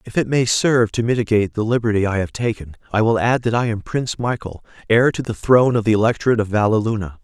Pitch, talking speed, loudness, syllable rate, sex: 115 Hz, 230 wpm, -18 LUFS, 6.8 syllables/s, male